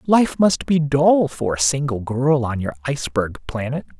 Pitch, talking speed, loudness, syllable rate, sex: 135 Hz, 180 wpm, -19 LUFS, 4.5 syllables/s, male